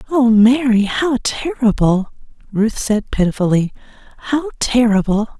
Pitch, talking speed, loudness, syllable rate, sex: 235 Hz, 100 wpm, -16 LUFS, 4.2 syllables/s, female